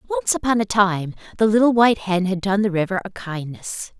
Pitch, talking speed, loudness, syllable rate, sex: 205 Hz, 210 wpm, -20 LUFS, 5.4 syllables/s, female